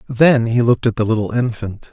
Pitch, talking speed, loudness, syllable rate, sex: 115 Hz, 220 wpm, -16 LUFS, 5.8 syllables/s, male